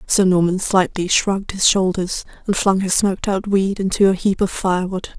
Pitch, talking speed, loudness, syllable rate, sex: 190 Hz, 210 wpm, -18 LUFS, 5.0 syllables/s, female